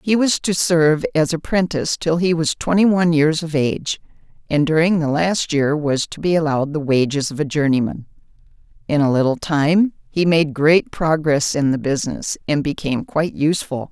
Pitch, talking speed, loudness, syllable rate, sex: 155 Hz, 185 wpm, -18 LUFS, 5.3 syllables/s, female